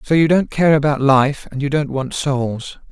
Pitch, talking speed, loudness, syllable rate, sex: 140 Hz, 225 wpm, -17 LUFS, 4.5 syllables/s, male